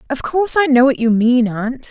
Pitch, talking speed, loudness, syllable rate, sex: 260 Hz, 250 wpm, -15 LUFS, 5.4 syllables/s, female